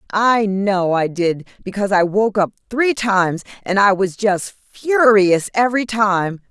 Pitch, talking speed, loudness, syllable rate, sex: 200 Hz, 155 wpm, -17 LUFS, 4.2 syllables/s, female